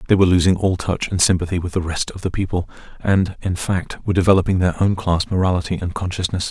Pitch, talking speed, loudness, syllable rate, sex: 90 Hz, 220 wpm, -19 LUFS, 6.4 syllables/s, male